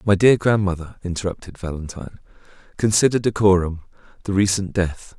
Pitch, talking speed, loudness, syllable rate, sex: 95 Hz, 105 wpm, -20 LUFS, 5.7 syllables/s, male